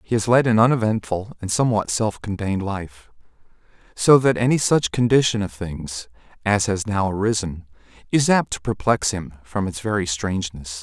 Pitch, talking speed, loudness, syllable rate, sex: 105 Hz, 160 wpm, -21 LUFS, 5.1 syllables/s, male